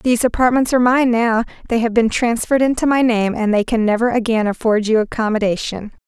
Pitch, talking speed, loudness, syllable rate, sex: 230 Hz, 195 wpm, -16 LUFS, 6.0 syllables/s, female